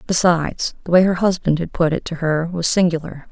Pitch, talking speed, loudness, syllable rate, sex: 170 Hz, 215 wpm, -18 LUFS, 5.6 syllables/s, female